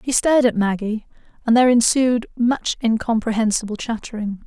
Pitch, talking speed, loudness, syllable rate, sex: 230 Hz, 135 wpm, -19 LUFS, 5.4 syllables/s, female